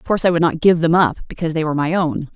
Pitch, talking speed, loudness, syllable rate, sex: 160 Hz, 330 wpm, -17 LUFS, 7.8 syllables/s, female